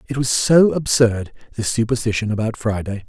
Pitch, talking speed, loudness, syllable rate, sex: 115 Hz, 155 wpm, -18 LUFS, 5.2 syllables/s, male